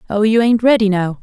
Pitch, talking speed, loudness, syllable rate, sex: 215 Hz, 245 wpm, -14 LUFS, 5.8 syllables/s, female